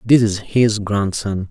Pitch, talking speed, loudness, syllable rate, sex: 105 Hz, 160 wpm, -18 LUFS, 3.6 syllables/s, male